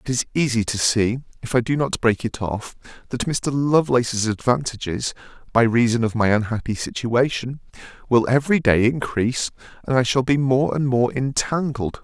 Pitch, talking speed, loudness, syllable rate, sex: 125 Hz, 170 wpm, -21 LUFS, 5.2 syllables/s, male